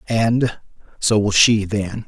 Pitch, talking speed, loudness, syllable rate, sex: 110 Hz, 115 wpm, -17 LUFS, 3.2 syllables/s, male